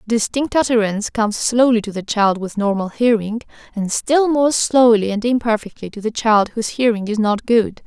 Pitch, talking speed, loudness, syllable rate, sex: 225 Hz, 185 wpm, -17 LUFS, 5.1 syllables/s, female